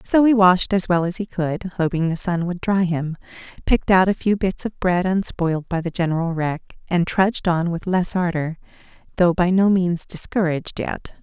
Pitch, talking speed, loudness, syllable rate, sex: 180 Hz, 205 wpm, -20 LUFS, 5.1 syllables/s, female